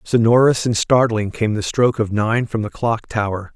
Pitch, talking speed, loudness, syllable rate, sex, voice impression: 110 Hz, 200 wpm, -18 LUFS, 4.9 syllables/s, male, very masculine, very adult-like, middle-aged, very thick, slightly tensed, powerful, slightly dark, slightly hard, muffled, fluent, cool, very intellectual, sincere, very calm, friendly, very reassuring, slightly elegant, very wild, sweet, kind, slightly modest